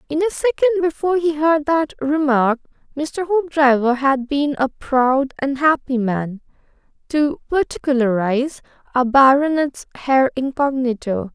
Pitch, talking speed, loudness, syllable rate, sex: 280 Hz, 120 wpm, -18 LUFS, 4.4 syllables/s, female